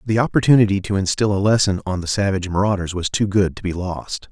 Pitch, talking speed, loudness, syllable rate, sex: 100 Hz, 225 wpm, -19 LUFS, 6.3 syllables/s, male